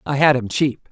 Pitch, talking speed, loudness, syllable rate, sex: 135 Hz, 260 wpm, -18 LUFS, 5.1 syllables/s, female